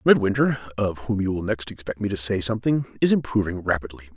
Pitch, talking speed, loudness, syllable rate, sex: 105 Hz, 200 wpm, -24 LUFS, 6.2 syllables/s, male